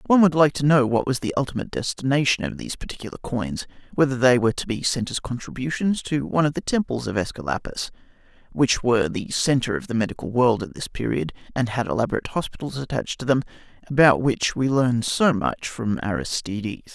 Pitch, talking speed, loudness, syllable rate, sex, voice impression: 130 Hz, 190 wpm, -23 LUFS, 6.1 syllables/s, male, very masculine, very middle-aged, thick, tensed, slightly powerful, bright, slightly hard, clear, fluent, slightly raspy, slightly cool, intellectual, slightly refreshing, slightly sincere, calm, slightly mature, slightly friendly, reassuring, unique, slightly elegant, wild, slightly sweet, lively, slightly strict, slightly intense, slightly sharp